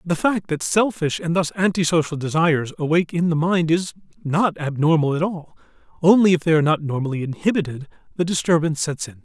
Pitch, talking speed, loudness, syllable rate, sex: 165 Hz, 180 wpm, -20 LUFS, 6.0 syllables/s, male